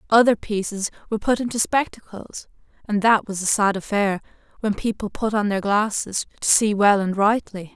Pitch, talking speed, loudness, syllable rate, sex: 210 Hz, 180 wpm, -21 LUFS, 4.9 syllables/s, female